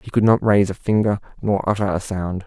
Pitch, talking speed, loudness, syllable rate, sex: 100 Hz, 245 wpm, -20 LUFS, 6.1 syllables/s, male